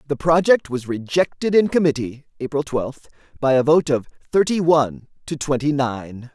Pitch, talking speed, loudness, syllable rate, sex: 140 Hz, 160 wpm, -19 LUFS, 5.0 syllables/s, male